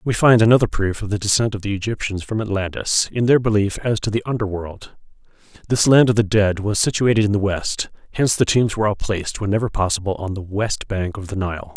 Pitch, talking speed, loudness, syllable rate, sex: 105 Hz, 225 wpm, -19 LUFS, 5.9 syllables/s, male